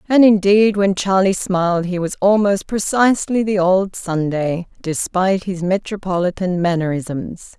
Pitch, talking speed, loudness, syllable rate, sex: 190 Hz, 125 wpm, -17 LUFS, 4.4 syllables/s, female